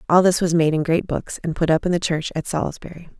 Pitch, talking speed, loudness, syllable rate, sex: 165 Hz, 280 wpm, -20 LUFS, 6.2 syllables/s, female